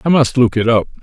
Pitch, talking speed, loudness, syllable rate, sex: 125 Hz, 290 wpm, -14 LUFS, 6.3 syllables/s, male